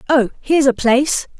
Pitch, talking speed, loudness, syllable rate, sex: 265 Hz, 170 wpm, -15 LUFS, 5.9 syllables/s, female